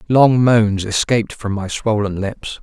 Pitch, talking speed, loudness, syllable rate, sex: 110 Hz, 160 wpm, -17 LUFS, 4.1 syllables/s, male